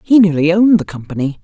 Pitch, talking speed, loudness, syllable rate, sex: 175 Hz, 210 wpm, -13 LUFS, 6.8 syllables/s, female